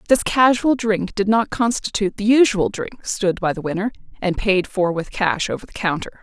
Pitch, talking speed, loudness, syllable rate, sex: 205 Hz, 200 wpm, -19 LUFS, 5.0 syllables/s, female